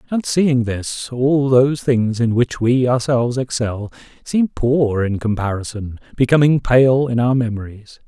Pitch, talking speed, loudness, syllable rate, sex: 125 Hz, 150 wpm, -17 LUFS, 4.3 syllables/s, male